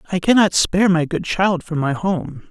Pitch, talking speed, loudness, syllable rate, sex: 180 Hz, 215 wpm, -18 LUFS, 5.0 syllables/s, male